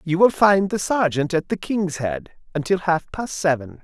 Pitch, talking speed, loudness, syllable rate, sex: 170 Hz, 190 wpm, -21 LUFS, 4.3 syllables/s, male